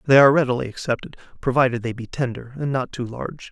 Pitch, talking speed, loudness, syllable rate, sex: 130 Hz, 205 wpm, -22 LUFS, 6.7 syllables/s, male